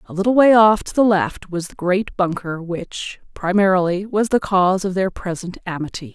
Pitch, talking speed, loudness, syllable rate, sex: 190 Hz, 195 wpm, -18 LUFS, 5.0 syllables/s, female